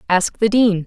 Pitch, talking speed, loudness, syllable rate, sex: 205 Hz, 210 wpm, -16 LUFS, 4.4 syllables/s, female